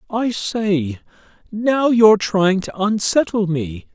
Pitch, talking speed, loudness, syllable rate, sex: 200 Hz, 120 wpm, -17 LUFS, 3.5 syllables/s, male